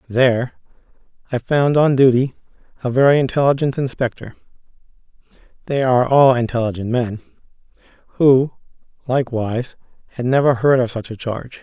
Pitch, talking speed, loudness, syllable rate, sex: 125 Hz, 120 wpm, -17 LUFS, 4.8 syllables/s, male